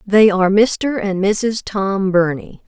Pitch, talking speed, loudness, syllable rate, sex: 200 Hz, 155 wpm, -16 LUFS, 3.6 syllables/s, female